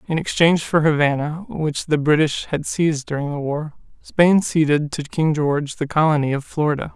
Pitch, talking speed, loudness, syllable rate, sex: 150 Hz, 180 wpm, -19 LUFS, 5.3 syllables/s, male